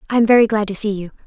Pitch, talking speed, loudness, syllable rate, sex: 210 Hz, 285 wpm, -16 LUFS, 7.3 syllables/s, female